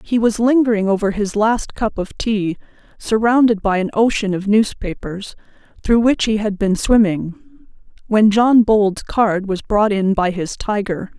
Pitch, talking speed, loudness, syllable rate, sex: 210 Hz, 165 wpm, -17 LUFS, 4.2 syllables/s, female